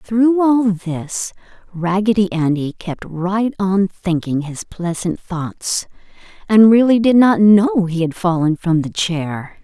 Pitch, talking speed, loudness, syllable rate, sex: 185 Hz, 145 wpm, -16 LUFS, 3.6 syllables/s, female